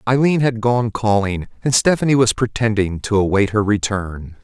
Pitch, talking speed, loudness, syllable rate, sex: 110 Hz, 160 wpm, -17 LUFS, 4.9 syllables/s, male